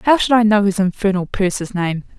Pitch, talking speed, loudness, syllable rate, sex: 200 Hz, 220 wpm, -17 LUFS, 5.4 syllables/s, female